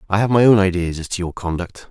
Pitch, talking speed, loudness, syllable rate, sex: 95 Hz, 285 wpm, -18 LUFS, 6.4 syllables/s, male